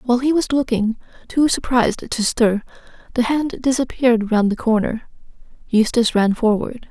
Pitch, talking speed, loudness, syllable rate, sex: 240 Hz, 150 wpm, -18 LUFS, 5.2 syllables/s, female